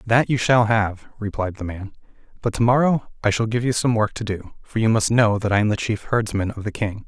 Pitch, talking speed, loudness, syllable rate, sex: 110 Hz, 265 wpm, -21 LUFS, 5.6 syllables/s, male